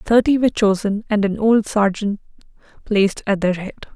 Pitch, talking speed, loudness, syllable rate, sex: 205 Hz, 165 wpm, -18 LUFS, 5.3 syllables/s, female